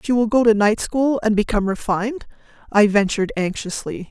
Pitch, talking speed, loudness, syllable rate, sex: 215 Hz, 175 wpm, -19 LUFS, 5.6 syllables/s, female